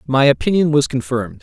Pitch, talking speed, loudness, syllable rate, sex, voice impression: 140 Hz, 170 wpm, -16 LUFS, 6.2 syllables/s, male, masculine, adult-like, fluent, sincere, friendly